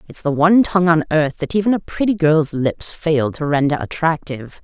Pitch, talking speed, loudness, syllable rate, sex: 160 Hz, 205 wpm, -17 LUFS, 5.5 syllables/s, female